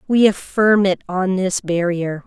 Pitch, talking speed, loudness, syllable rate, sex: 185 Hz, 160 wpm, -18 LUFS, 3.9 syllables/s, female